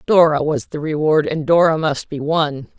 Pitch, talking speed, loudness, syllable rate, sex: 155 Hz, 195 wpm, -17 LUFS, 4.6 syllables/s, female